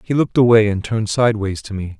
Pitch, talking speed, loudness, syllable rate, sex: 105 Hz, 240 wpm, -17 LUFS, 6.9 syllables/s, male